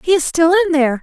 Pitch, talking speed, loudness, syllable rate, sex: 325 Hz, 295 wpm, -14 LUFS, 6.8 syllables/s, female